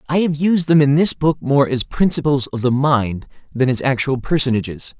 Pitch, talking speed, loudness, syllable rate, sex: 140 Hz, 205 wpm, -17 LUFS, 5.1 syllables/s, male